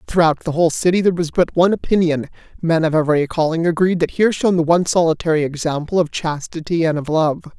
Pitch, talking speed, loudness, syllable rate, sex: 165 Hz, 205 wpm, -17 LUFS, 6.7 syllables/s, male